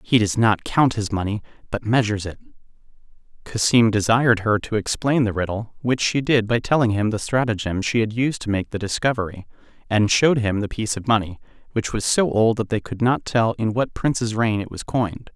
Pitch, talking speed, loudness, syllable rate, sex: 110 Hz, 210 wpm, -21 LUFS, 5.6 syllables/s, male